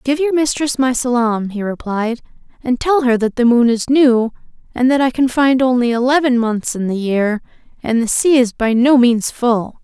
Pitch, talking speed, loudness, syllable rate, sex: 245 Hz, 205 wpm, -15 LUFS, 4.7 syllables/s, female